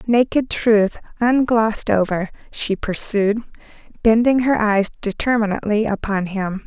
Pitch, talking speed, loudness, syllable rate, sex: 215 Hz, 110 wpm, -19 LUFS, 4.4 syllables/s, female